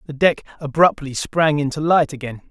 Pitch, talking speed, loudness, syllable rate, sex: 150 Hz, 165 wpm, -18 LUFS, 5.3 syllables/s, male